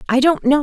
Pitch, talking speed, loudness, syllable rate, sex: 280 Hz, 290 wpm, -15 LUFS, 6.0 syllables/s, female